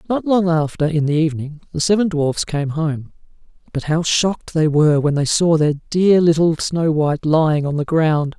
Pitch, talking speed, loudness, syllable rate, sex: 160 Hz, 200 wpm, -17 LUFS, 4.9 syllables/s, male